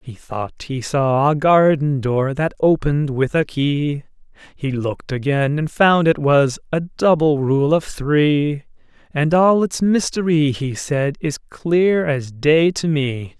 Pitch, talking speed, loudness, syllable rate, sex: 150 Hz, 160 wpm, -18 LUFS, 3.7 syllables/s, male